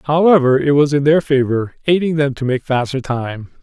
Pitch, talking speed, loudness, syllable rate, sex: 140 Hz, 200 wpm, -15 LUFS, 5.2 syllables/s, male